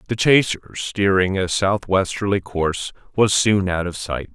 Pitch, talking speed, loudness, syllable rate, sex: 95 Hz, 165 wpm, -20 LUFS, 4.4 syllables/s, male